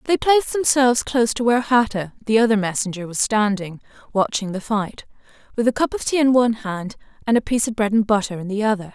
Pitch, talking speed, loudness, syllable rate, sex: 220 Hz, 220 wpm, -20 LUFS, 6.3 syllables/s, female